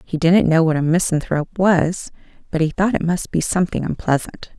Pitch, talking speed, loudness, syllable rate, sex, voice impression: 170 Hz, 195 wpm, -18 LUFS, 5.5 syllables/s, female, feminine, adult-like, tensed, powerful, bright, slightly soft, clear, fluent, slightly raspy, intellectual, calm, slightly friendly, reassuring, elegant, lively, slightly sharp